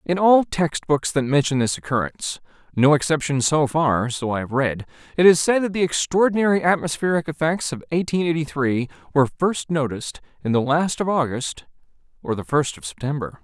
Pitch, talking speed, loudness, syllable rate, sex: 150 Hz, 175 wpm, -21 LUFS, 5.5 syllables/s, male